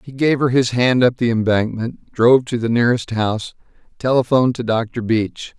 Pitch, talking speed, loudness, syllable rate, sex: 120 Hz, 185 wpm, -17 LUFS, 5.3 syllables/s, male